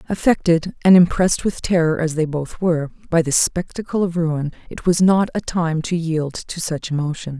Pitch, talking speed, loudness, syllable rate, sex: 165 Hz, 195 wpm, -19 LUFS, 5.0 syllables/s, female